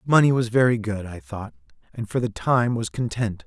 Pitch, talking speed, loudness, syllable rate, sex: 115 Hz, 210 wpm, -23 LUFS, 5.1 syllables/s, male